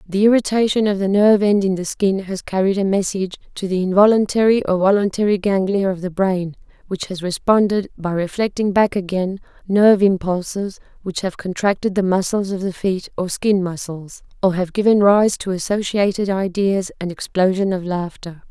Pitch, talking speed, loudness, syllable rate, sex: 195 Hz, 170 wpm, -18 LUFS, 5.2 syllables/s, female